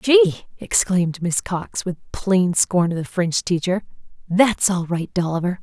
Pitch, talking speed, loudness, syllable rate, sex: 185 Hz, 160 wpm, -20 LUFS, 4.3 syllables/s, female